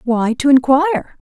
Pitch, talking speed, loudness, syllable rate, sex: 275 Hz, 135 wpm, -14 LUFS, 6.4 syllables/s, female